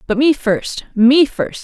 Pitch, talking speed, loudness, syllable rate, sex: 255 Hz, 145 wpm, -15 LUFS, 3.6 syllables/s, female